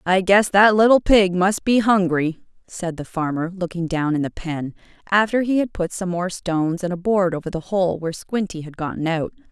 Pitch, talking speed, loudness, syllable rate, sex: 180 Hz, 215 wpm, -20 LUFS, 5.1 syllables/s, female